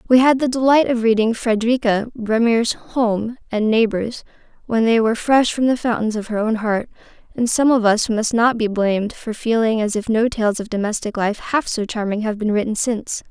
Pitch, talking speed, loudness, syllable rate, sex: 225 Hz, 210 wpm, -18 LUFS, 5.2 syllables/s, female